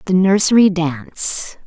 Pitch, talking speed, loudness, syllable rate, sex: 180 Hz, 110 wpm, -15 LUFS, 4.2 syllables/s, female